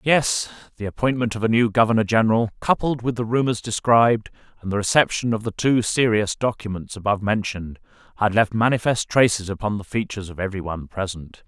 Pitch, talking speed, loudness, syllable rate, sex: 110 Hz, 180 wpm, -21 LUFS, 6.2 syllables/s, male